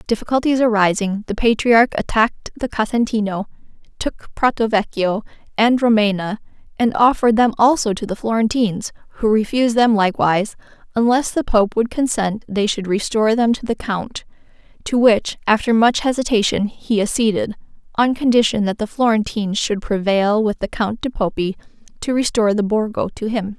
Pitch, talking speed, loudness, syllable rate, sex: 220 Hz, 155 wpm, -18 LUFS, 5.4 syllables/s, female